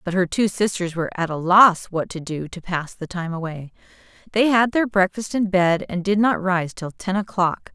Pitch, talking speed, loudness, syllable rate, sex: 185 Hz, 225 wpm, -21 LUFS, 4.9 syllables/s, female